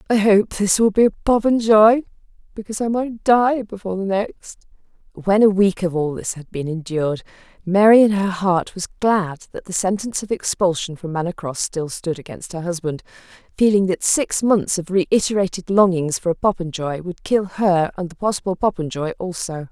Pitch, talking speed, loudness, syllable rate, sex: 190 Hz, 185 wpm, -19 LUFS, 5.1 syllables/s, female